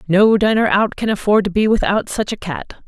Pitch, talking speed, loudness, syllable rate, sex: 200 Hz, 230 wpm, -16 LUFS, 5.4 syllables/s, female